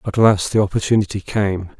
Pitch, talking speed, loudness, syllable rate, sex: 100 Hz, 165 wpm, -18 LUFS, 5.4 syllables/s, male